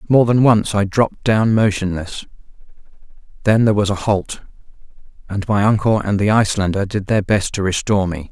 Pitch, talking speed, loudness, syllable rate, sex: 105 Hz, 175 wpm, -17 LUFS, 5.6 syllables/s, male